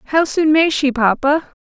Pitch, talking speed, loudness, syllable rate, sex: 290 Hz, 185 wpm, -15 LUFS, 4.0 syllables/s, female